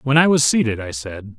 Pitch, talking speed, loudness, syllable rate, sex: 125 Hz, 260 wpm, -17 LUFS, 5.4 syllables/s, male